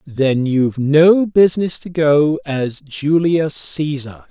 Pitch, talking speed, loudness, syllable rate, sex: 155 Hz, 125 wpm, -16 LUFS, 3.2 syllables/s, male